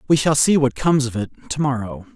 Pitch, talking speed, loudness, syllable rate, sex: 135 Hz, 220 wpm, -19 LUFS, 5.8 syllables/s, male